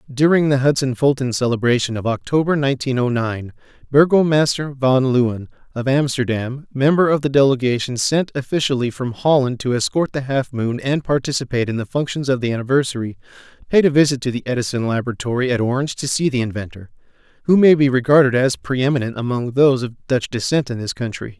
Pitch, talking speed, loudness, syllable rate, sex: 130 Hz, 175 wpm, -18 LUFS, 6.0 syllables/s, male